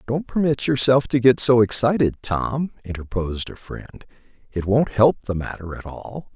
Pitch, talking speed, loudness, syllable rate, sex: 115 Hz, 170 wpm, -20 LUFS, 5.0 syllables/s, male